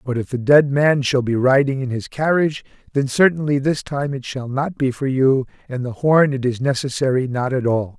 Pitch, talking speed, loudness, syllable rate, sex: 135 Hz, 225 wpm, -19 LUFS, 5.2 syllables/s, male